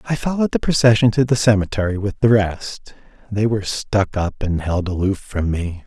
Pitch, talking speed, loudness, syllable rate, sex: 105 Hz, 195 wpm, -19 LUFS, 5.3 syllables/s, male